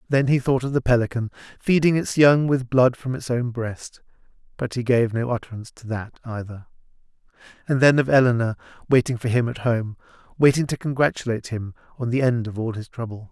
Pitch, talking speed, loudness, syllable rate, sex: 125 Hz, 195 wpm, -22 LUFS, 5.8 syllables/s, male